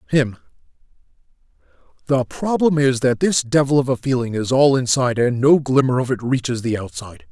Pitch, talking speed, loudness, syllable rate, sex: 130 Hz, 170 wpm, -18 LUFS, 5.6 syllables/s, male